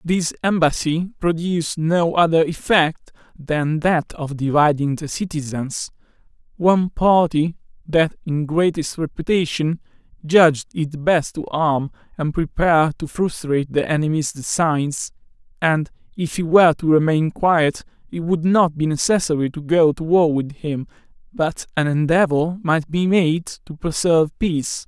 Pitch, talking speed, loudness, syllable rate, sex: 160 Hz, 135 wpm, -19 LUFS, 4.4 syllables/s, male